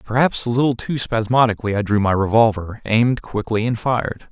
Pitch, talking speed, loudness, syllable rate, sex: 115 Hz, 180 wpm, -19 LUFS, 5.7 syllables/s, male